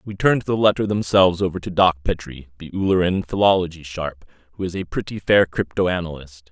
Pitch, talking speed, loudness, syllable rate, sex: 90 Hz, 175 wpm, -20 LUFS, 5.9 syllables/s, male